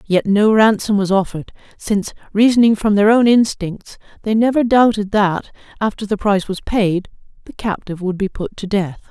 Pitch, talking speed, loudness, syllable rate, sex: 205 Hz, 180 wpm, -16 LUFS, 5.2 syllables/s, female